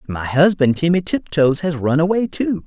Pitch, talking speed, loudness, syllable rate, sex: 160 Hz, 180 wpm, -17 LUFS, 4.8 syllables/s, male